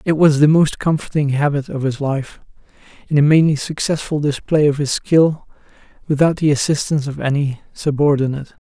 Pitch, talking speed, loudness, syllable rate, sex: 145 Hz, 160 wpm, -17 LUFS, 5.5 syllables/s, male